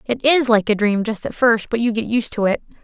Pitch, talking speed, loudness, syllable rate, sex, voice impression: 225 Hz, 295 wpm, -18 LUFS, 5.5 syllables/s, female, feminine, adult-like, tensed, powerful, bright, clear, fluent, intellectual, calm, friendly, elegant, lively, slightly kind